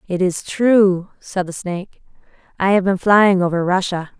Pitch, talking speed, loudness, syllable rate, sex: 190 Hz, 170 wpm, -17 LUFS, 4.5 syllables/s, female